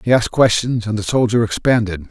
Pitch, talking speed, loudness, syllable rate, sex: 110 Hz, 170 wpm, -16 LUFS, 6.0 syllables/s, male